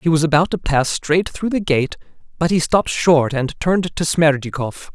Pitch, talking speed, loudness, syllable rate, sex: 155 Hz, 205 wpm, -18 LUFS, 4.9 syllables/s, male